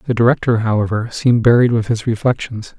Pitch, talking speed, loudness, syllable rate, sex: 115 Hz, 170 wpm, -16 LUFS, 6.2 syllables/s, male